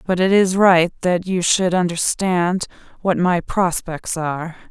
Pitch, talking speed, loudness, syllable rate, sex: 180 Hz, 155 wpm, -18 LUFS, 3.9 syllables/s, female